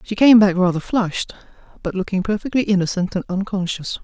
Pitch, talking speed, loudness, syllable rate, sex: 195 Hz, 165 wpm, -19 LUFS, 5.9 syllables/s, female